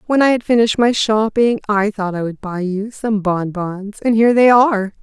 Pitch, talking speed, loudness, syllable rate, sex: 215 Hz, 215 wpm, -16 LUFS, 5.1 syllables/s, female